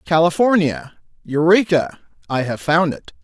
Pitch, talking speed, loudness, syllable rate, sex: 165 Hz, 95 wpm, -17 LUFS, 4.3 syllables/s, male